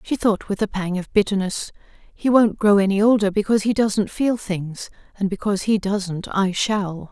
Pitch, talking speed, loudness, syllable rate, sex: 200 Hz, 195 wpm, -20 LUFS, 4.8 syllables/s, female